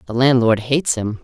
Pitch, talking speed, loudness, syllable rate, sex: 125 Hz, 195 wpm, -17 LUFS, 5.6 syllables/s, female